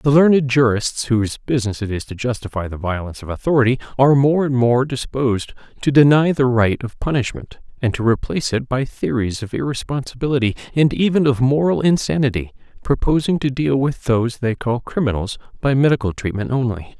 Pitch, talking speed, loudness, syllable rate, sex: 125 Hz, 175 wpm, -18 LUFS, 5.8 syllables/s, male